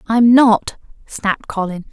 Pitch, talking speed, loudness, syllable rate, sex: 220 Hz, 125 wpm, -15 LUFS, 4.1 syllables/s, female